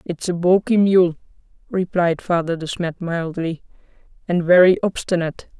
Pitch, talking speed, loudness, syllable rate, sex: 175 Hz, 130 wpm, -19 LUFS, 4.8 syllables/s, female